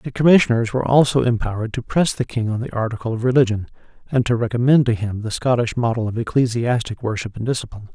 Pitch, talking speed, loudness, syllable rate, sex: 120 Hz, 205 wpm, -19 LUFS, 6.7 syllables/s, male